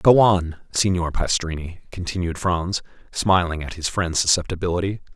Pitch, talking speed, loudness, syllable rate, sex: 90 Hz, 130 wpm, -22 LUFS, 4.9 syllables/s, male